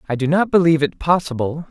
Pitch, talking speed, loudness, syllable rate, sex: 155 Hz, 210 wpm, -17 LUFS, 6.5 syllables/s, male